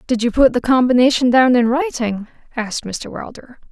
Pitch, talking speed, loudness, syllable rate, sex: 250 Hz, 180 wpm, -16 LUFS, 5.3 syllables/s, female